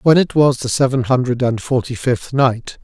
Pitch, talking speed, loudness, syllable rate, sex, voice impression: 130 Hz, 210 wpm, -16 LUFS, 4.7 syllables/s, male, masculine, middle-aged, tensed, powerful, slightly bright, slightly muffled, intellectual, calm, slightly mature, friendly, wild, slightly lively, slightly kind